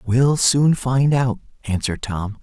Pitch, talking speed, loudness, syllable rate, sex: 125 Hz, 150 wpm, -19 LUFS, 3.9 syllables/s, male